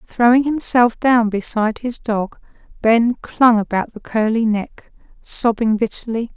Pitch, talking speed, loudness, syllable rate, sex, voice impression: 230 Hz, 130 wpm, -17 LUFS, 4.2 syllables/s, female, feminine, slightly young, slightly thin, cute, slightly sincere, friendly